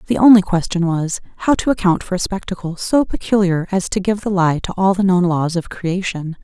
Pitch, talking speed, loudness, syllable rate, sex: 185 Hz, 225 wpm, -17 LUFS, 5.4 syllables/s, female